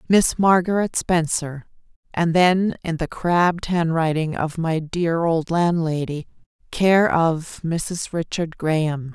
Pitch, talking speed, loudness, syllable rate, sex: 165 Hz, 125 wpm, -21 LUFS, 3.6 syllables/s, female